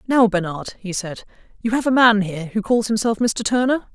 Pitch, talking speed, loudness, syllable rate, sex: 215 Hz, 215 wpm, -19 LUFS, 5.4 syllables/s, female